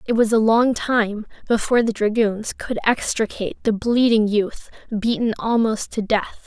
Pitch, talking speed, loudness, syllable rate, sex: 220 Hz, 160 wpm, -20 LUFS, 4.5 syllables/s, female